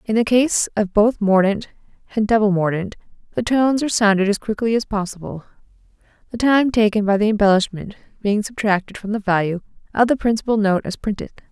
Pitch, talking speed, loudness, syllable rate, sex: 210 Hz, 175 wpm, -19 LUFS, 6.0 syllables/s, female